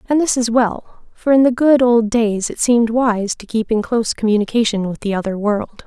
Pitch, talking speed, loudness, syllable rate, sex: 230 Hz, 225 wpm, -16 LUFS, 5.2 syllables/s, female